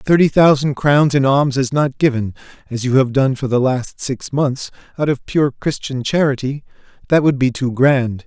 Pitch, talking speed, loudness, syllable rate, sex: 135 Hz, 195 wpm, -16 LUFS, 4.6 syllables/s, male